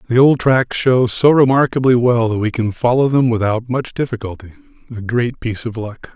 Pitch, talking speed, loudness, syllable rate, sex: 120 Hz, 185 wpm, -15 LUFS, 5.3 syllables/s, male